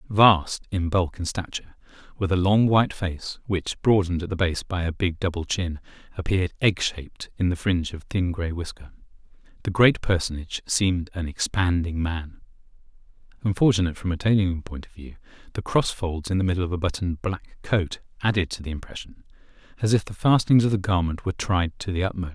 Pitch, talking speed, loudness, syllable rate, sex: 90 Hz, 190 wpm, -24 LUFS, 5.8 syllables/s, male